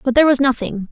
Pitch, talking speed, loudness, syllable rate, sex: 260 Hz, 265 wpm, -16 LUFS, 7.4 syllables/s, female